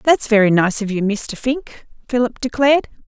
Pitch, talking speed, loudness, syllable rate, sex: 235 Hz, 175 wpm, -17 LUFS, 4.9 syllables/s, female